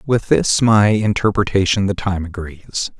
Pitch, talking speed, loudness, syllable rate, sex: 100 Hz, 140 wpm, -17 LUFS, 4.3 syllables/s, male